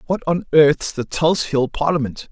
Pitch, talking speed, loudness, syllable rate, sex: 150 Hz, 180 wpm, -18 LUFS, 4.9 syllables/s, male